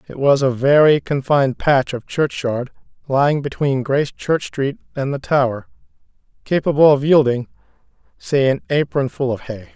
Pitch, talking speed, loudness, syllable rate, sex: 135 Hz, 140 wpm, -18 LUFS, 4.9 syllables/s, male